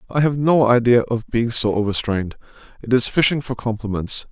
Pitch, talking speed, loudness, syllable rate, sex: 120 Hz, 180 wpm, -18 LUFS, 5.5 syllables/s, male